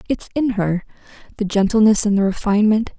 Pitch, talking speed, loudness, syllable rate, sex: 210 Hz, 140 wpm, -18 LUFS, 5.9 syllables/s, female